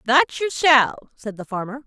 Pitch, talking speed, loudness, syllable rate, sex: 260 Hz, 195 wpm, -19 LUFS, 4.4 syllables/s, female